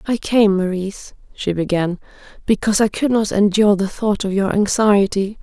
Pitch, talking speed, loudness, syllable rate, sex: 200 Hz, 165 wpm, -17 LUFS, 5.2 syllables/s, female